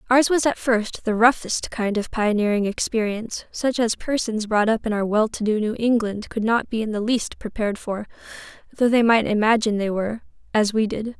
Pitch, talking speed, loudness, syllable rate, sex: 220 Hz, 210 wpm, -22 LUFS, 5.4 syllables/s, female